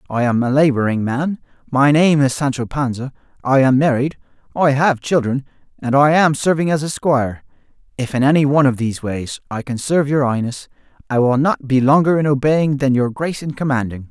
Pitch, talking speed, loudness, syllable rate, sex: 135 Hz, 200 wpm, -17 LUFS, 5.6 syllables/s, male